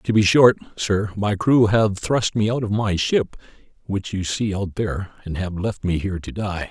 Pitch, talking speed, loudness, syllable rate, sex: 100 Hz, 225 wpm, -21 LUFS, 4.6 syllables/s, male